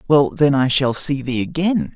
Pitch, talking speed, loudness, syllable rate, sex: 145 Hz, 215 wpm, -18 LUFS, 4.5 syllables/s, male